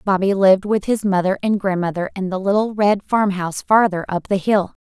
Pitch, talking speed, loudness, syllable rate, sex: 195 Hz, 200 wpm, -18 LUFS, 5.5 syllables/s, female